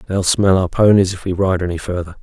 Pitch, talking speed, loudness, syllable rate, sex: 95 Hz, 245 wpm, -16 LUFS, 5.9 syllables/s, male